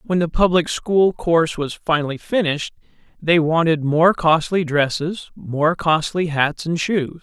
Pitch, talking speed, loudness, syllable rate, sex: 165 Hz, 150 wpm, -19 LUFS, 4.3 syllables/s, male